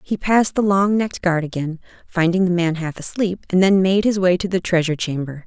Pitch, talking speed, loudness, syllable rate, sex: 180 Hz, 230 wpm, -19 LUFS, 5.7 syllables/s, female